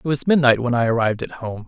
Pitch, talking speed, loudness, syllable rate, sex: 125 Hz, 285 wpm, -19 LUFS, 6.8 syllables/s, male